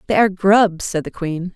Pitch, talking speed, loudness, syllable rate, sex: 190 Hz, 230 wpm, -17 LUFS, 5.1 syllables/s, female